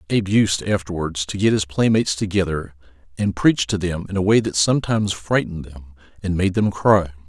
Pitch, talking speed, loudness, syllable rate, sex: 95 Hz, 190 wpm, -20 LUFS, 5.7 syllables/s, male